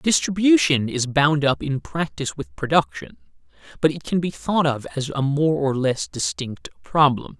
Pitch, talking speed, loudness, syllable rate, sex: 140 Hz, 170 wpm, -21 LUFS, 4.6 syllables/s, male